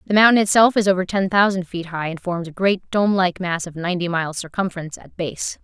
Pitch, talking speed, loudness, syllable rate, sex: 185 Hz, 235 wpm, -19 LUFS, 6.1 syllables/s, female